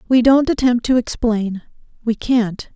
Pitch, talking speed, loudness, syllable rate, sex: 235 Hz, 155 wpm, -17 LUFS, 4.2 syllables/s, female